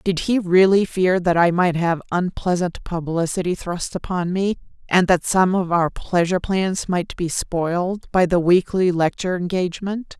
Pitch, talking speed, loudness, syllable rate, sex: 180 Hz, 165 wpm, -20 LUFS, 4.6 syllables/s, female